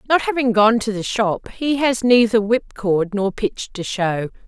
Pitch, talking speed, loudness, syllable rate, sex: 220 Hz, 190 wpm, -19 LUFS, 4.3 syllables/s, female